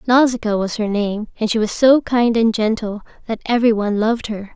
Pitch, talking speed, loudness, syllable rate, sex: 220 Hz, 210 wpm, -18 LUFS, 5.8 syllables/s, female